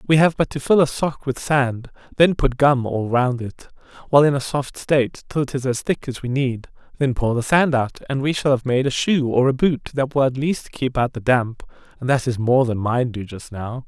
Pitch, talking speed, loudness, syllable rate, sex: 130 Hz, 260 wpm, -20 LUFS, 5.1 syllables/s, male